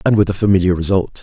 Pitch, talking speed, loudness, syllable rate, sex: 95 Hz, 245 wpm, -15 LUFS, 7.1 syllables/s, male